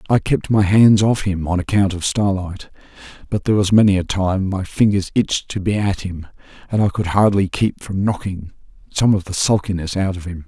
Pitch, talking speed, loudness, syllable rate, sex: 95 Hz, 210 wpm, -18 LUFS, 5.3 syllables/s, male